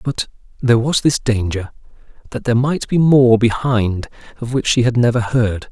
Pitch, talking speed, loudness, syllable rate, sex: 120 Hz, 170 wpm, -16 LUFS, 5.0 syllables/s, male